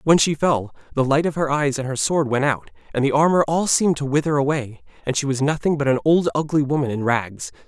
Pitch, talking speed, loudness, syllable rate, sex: 145 Hz, 250 wpm, -20 LUFS, 5.8 syllables/s, male